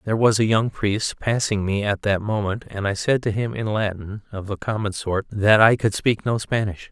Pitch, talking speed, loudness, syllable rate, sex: 105 Hz, 235 wpm, -21 LUFS, 4.9 syllables/s, male